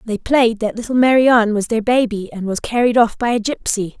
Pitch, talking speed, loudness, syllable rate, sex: 225 Hz, 225 wpm, -16 LUFS, 5.4 syllables/s, female